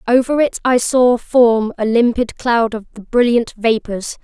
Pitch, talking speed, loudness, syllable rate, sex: 235 Hz, 170 wpm, -15 LUFS, 4.2 syllables/s, female